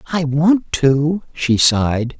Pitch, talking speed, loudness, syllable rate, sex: 145 Hz, 135 wpm, -16 LUFS, 3.4 syllables/s, male